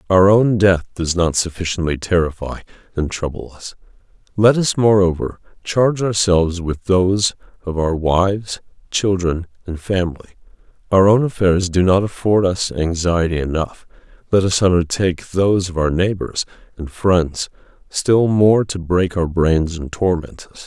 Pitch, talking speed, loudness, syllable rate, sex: 90 Hz, 145 wpm, -17 LUFS, 4.6 syllables/s, male